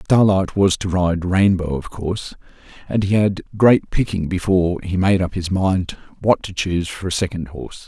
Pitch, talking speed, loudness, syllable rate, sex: 95 Hz, 185 wpm, -19 LUFS, 4.8 syllables/s, male